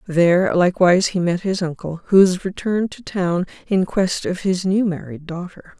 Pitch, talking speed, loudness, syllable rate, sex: 180 Hz, 185 wpm, -19 LUFS, 5.0 syllables/s, female